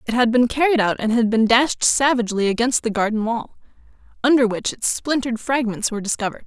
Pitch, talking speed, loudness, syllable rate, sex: 235 Hz, 195 wpm, -19 LUFS, 6.2 syllables/s, female